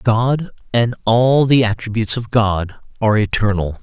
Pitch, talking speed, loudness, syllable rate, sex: 115 Hz, 140 wpm, -16 LUFS, 4.7 syllables/s, male